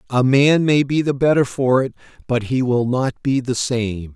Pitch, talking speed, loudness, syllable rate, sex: 130 Hz, 215 wpm, -18 LUFS, 4.5 syllables/s, male